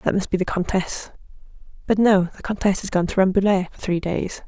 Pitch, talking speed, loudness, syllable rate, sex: 190 Hz, 215 wpm, -21 LUFS, 6.3 syllables/s, female